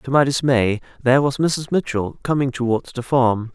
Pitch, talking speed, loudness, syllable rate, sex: 130 Hz, 185 wpm, -19 LUFS, 5.0 syllables/s, male